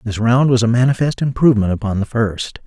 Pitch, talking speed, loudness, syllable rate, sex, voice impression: 120 Hz, 205 wpm, -16 LUFS, 5.9 syllables/s, male, very masculine, very middle-aged, very thick, slightly relaxed, weak, slightly bright, very soft, muffled, slightly fluent, very cool, very intellectual, refreshing, very sincere, very calm, very mature, very friendly, very reassuring, very unique, elegant, slightly wild, sweet, lively, kind, slightly modest